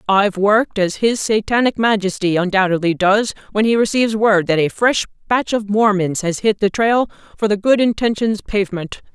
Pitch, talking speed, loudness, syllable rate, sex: 205 Hz, 175 wpm, -17 LUFS, 5.3 syllables/s, female